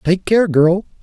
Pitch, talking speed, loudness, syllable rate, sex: 185 Hz, 175 wpm, -14 LUFS, 3.9 syllables/s, male